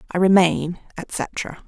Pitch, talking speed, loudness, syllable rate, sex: 180 Hz, 105 wpm, -20 LUFS, 3.4 syllables/s, female